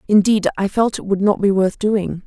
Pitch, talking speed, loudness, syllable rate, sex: 200 Hz, 240 wpm, -17 LUFS, 5.0 syllables/s, female